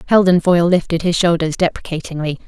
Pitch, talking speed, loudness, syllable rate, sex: 170 Hz, 145 wpm, -16 LUFS, 6.4 syllables/s, female